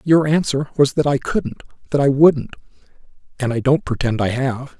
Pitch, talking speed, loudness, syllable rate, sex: 135 Hz, 190 wpm, -18 LUFS, 5.0 syllables/s, male